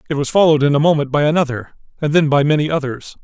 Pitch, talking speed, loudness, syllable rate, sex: 145 Hz, 240 wpm, -16 LUFS, 7.3 syllables/s, male